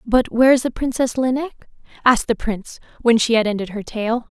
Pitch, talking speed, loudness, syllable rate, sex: 235 Hz, 205 wpm, -19 LUFS, 5.9 syllables/s, female